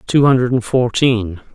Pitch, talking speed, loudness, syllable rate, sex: 120 Hz, 115 wpm, -15 LUFS, 3.9 syllables/s, male